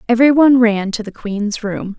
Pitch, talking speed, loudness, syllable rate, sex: 225 Hz, 210 wpm, -15 LUFS, 5.5 syllables/s, female